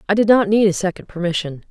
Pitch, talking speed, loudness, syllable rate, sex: 190 Hz, 245 wpm, -17 LUFS, 6.7 syllables/s, female